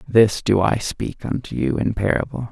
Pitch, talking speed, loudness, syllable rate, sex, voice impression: 105 Hz, 190 wpm, -20 LUFS, 4.6 syllables/s, male, masculine, adult-like, slightly dark, sincere, slightly calm, slightly unique